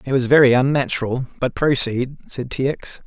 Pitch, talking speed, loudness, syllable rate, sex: 130 Hz, 175 wpm, -19 LUFS, 5.0 syllables/s, male